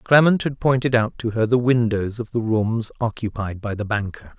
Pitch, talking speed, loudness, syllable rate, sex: 115 Hz, 205 wpm, -21 LUFS, 5.0 syllables/s, male